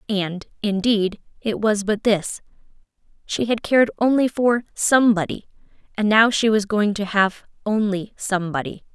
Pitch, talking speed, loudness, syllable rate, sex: 210 Hz, 140 wpm, -20 LUFS, 4.7 syllables/s, female